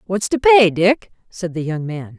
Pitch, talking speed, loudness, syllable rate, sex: 190 Hz, 220 wpm, -16 LUFS, 4.3 syllables/s, female